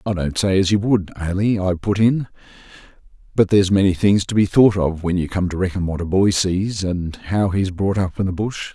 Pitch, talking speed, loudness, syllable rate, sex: 95 Hz, 240 wpm, -19 LUFS, 5.3 syllables/s, male